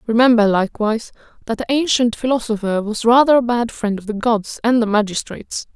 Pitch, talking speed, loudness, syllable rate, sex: 230 Hz, 175 wpm, -17 LUFS, 5.9 syllables/s, female